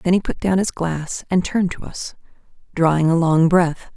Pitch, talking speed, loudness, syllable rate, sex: 170 Hz, 210 wpm, -19 LUFS, 5.1 syllables/s, female